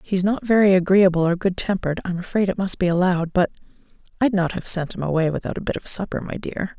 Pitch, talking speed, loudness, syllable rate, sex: 185 Hz, 230 wpm, -20 LUFS, 6.4 syllables/s, female